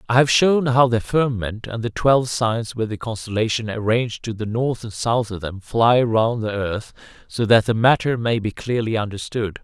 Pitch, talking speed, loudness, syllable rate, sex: 115 Hz, 205 wpm, -20 LUFS, 5.0 syllables/s, male